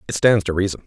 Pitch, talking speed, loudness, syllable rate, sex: 95 Hz, 280 wpm, -19 LUFS, 7.1 syllables/s, male